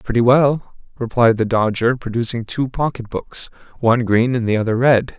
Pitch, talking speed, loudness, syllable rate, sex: 120 Hz, 175 wpm, -17 LUFS, 5.0 syllables/s, male